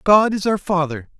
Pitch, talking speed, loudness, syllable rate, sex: 180 Hz, 200 wpm, -18 LUFS, 4.9 syllables/s, male